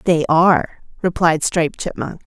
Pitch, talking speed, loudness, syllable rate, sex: 165 Hz, 130 wpm, -17 LUFS, 4.9 syllables/s, female